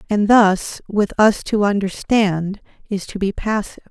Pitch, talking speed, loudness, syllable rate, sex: 205 Hz, 155 wpm, -18 LUFS, 4.3 syllables/s, female